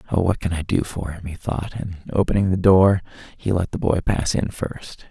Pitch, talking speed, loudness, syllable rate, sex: 90 Hz, 235 wpm, -22 LUFS, 5.2 syllables/s, male